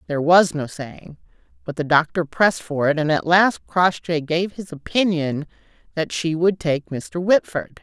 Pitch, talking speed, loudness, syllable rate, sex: 165 Hz, 175 wpm, -20 LUFS, 4.5 syllables/s, female